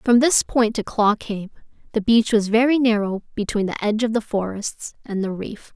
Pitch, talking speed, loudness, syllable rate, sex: 220 Hz, 210 wpm, -21 LUFS, 5.1 syllables/s, female